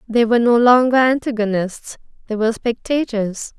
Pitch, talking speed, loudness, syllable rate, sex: 230 Hz, 135 wpm, -17 LUFS, 5.2 syllables/s, female